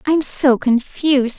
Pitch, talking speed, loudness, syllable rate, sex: 265 Hz, 175 wpm, -16 LUFS, 4.9 syllables/s, female